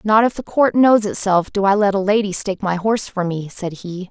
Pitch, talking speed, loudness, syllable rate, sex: 200 Hz, 265 wpm, -17 LUFS, 5.5 syllables/s, female